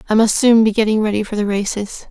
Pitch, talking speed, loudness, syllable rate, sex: 215 Hz, 255 wpm, -16 LUFS, 6.3 syllables/s, female